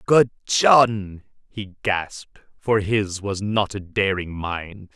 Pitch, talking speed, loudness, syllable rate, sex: 100 Hz, 135 wpm, -21 LUFS, 3.1 syllables/s, male